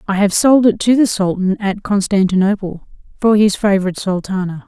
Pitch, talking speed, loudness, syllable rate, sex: 200 Hz, 165 wpm, -15 LUFS, 5.4 syllables/s, female